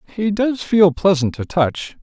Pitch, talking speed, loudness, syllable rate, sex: 185 Hz, 175 wpm, -17 LUFS, 4.1 syllables/s, male